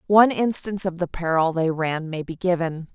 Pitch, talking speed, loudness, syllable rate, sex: 175 Hz, 205 wpm, -22 LUFS, 5.4 syllables/s, female